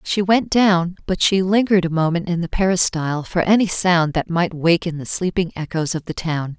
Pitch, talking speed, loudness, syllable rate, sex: 175 Hz, 210 wpm, -19 LUFS, 5.2 syllables/s, female